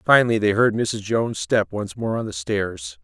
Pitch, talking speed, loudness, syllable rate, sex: 110 Hz, 220 wpm, -21 LUFS, 4.8 syllables/s, male